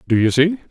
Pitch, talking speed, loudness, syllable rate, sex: 150 Hz, 255 wpm, -16 LUFS, 6.1 syllables/s, male